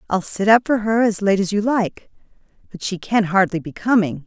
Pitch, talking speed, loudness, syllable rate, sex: 200 Hz, 225 wpm, -19 LUFS, 5.2 syllables/s, female